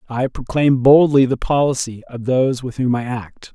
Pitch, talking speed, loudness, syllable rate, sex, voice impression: 130 Hz, 185 wpm, -17 LUFS, 4.9 syllables/s, male, very masculine, slightly middle-aged, slightly thick, slightly cool, sincere, slightly calm